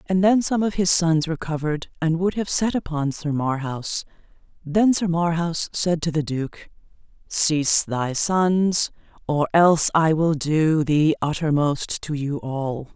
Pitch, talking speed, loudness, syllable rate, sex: 160 Hz, 160 wpm, -21 LUFS, 4.0 syllables/s, female